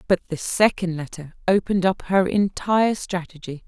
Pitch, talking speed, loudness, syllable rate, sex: 180 Hz, 145 wpm, -22 LUFS, 5.2 syllables/s, female